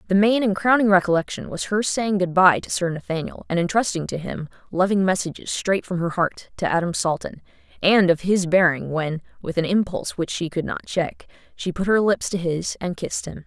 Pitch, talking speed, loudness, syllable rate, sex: 185 Hz, 200 wpm, -22 LUFS, 5.4 syllables/s, female